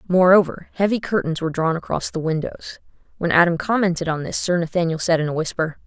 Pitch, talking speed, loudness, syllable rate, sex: 170 Hz, 195 wpm, -20 LUFS, 6.2 syllables/s, female